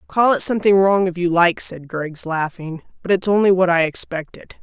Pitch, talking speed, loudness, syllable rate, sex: 180 Hz, 210 wpm, -17 LUFS, 5.2 syllables/s, female